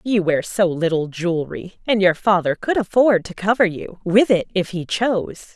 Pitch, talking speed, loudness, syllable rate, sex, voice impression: 195 Hz, 195 wpm, -19 LUFS, 4.8 syllables/s, female, feminine, adult-like, slightly powerful, intellectual, slightly intense